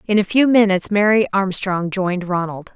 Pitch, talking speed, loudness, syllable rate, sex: 195 Hz, 175 wpm, -17 LUFS, 5.5 syllables/s, female